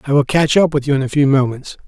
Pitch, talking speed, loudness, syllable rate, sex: 140 Hz, 320 wpm, -15 LUFS, 6.6 syllables/s, male